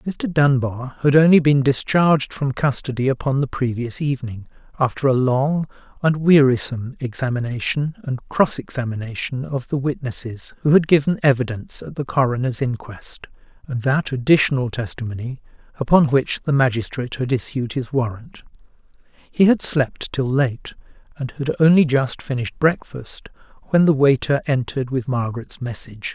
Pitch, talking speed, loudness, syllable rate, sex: 135 Hz, 140 wpm, -20 LUFS, 5.1 syllables/s, male